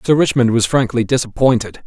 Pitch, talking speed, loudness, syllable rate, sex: 120 Hz, 160 wpm, -15 LUFS, 5.8 syllables/s, male